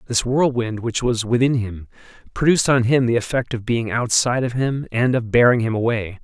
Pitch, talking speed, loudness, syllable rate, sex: 120 Hz, 200 wpm, -19 LUFS, 5.4 syllables/s, male